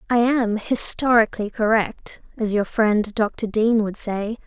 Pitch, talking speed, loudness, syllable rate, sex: 220 Hz, 150 wpm, -20 LUFS, 3.9 syllables/s, female